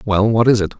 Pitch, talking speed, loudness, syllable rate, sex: 110 Hz, 300 wpm, -15 LUFS, 6.1 syllables/s, male